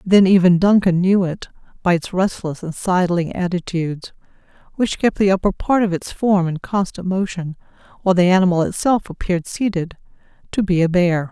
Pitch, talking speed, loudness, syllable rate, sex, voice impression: 185 Hz, 170 wpm, -18 LUFS, 5.3 syllables/s, female, feminine, adult-like, tensed, slightly dark, soft, fluent, intellectual, calm, elegant, slightly sharp, modest